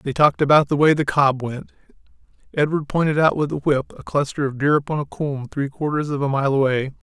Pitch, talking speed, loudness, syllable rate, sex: 145 Hz, 230 wpm, -20 LUFS, 6.0 syllables/s, male